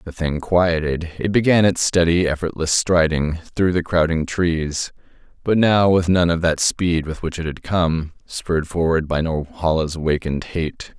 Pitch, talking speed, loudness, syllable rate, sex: 85 Hz, 165 wpm, -19 LUFS, 4.5 syllables/s, male